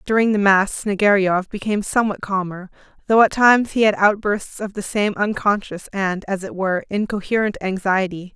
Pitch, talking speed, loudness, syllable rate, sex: 200 Hz, 165 wpm, -19 LUFS, 5.3 syllables/s, female